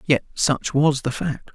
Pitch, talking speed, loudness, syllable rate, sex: 140 Hz, 195 wpm, -21 LUFS, 3.8 syllables/s, male